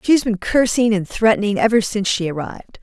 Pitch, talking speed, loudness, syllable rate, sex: 215 Hz, 210 wpm, -17 LUFS, 6.2 syllables/s, female